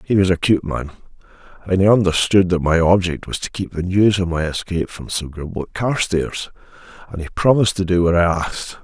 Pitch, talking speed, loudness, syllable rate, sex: 90 Hz, 210 wpm, -18 LUFS, 5.7 syllables/s, male